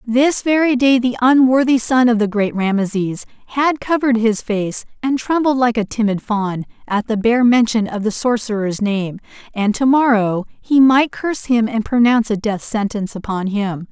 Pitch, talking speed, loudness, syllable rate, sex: 230 Hz, 180 wpm, -16 LUFS, 4.8 syllables/s, female